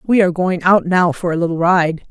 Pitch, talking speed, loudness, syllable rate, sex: 175 Hz, 255 wpm, -15 LUFS, 5.4 syllables/s, female